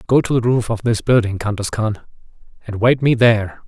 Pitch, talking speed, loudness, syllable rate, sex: 115 Hz, 210 wpm, -17 LUFS, 5.7 syllables/s, male